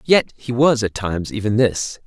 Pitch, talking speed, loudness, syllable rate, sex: 115 Hz, 205 wpm, -19 LUFS, 4.7 syllables/s, male